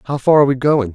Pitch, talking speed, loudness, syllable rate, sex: 135 Hz, 315 wpm, -14 LUFS, 7.8 syllables/s, male